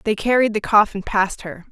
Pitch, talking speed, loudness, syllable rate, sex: 210 Hz, 210 wpm, -18 LUFS, 5.1 syllables/s, female